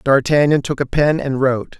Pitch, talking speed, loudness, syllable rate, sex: 135 Hz, 200 wpm, -16 LUFS, 5.3 syllables/s, male